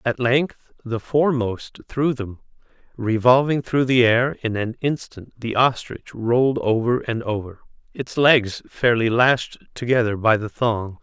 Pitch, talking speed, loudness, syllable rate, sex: 120 Hz, 145 wpm, -20 LUFS, 4.1 syllables/s, male